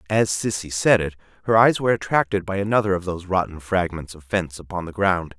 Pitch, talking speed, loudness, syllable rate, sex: 95 Hz, 210 wpm, -21 LUFS, 6.1 syllables/s, male